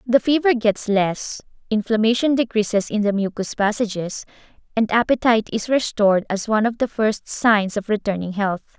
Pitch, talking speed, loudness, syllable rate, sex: 220 Hz, 155 wpm, -20 LUFS, 5.1 syllables/s, female